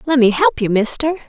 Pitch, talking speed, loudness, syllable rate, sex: 245 Hz, 190 wpm, -15 LUFS, 6.5 syllables/s, female